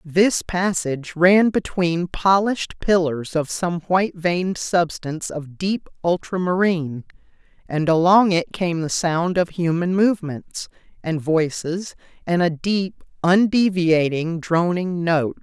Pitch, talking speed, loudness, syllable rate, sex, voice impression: 175 Hz, 120 wpm, -20 LUFS, 4.0 syllables/s, female, feminine, gender-neutral, adult-like, slightly middle-aged, slightly thin, tensed, slightly powerful, bright, hard, clear, fluent, slightly raspy, cool, slightly intellectual, refreshing, calm, slightly friendly, reassuring, very unique, slightly elegant, slightly wild, slightly sweet, slightly lively, strict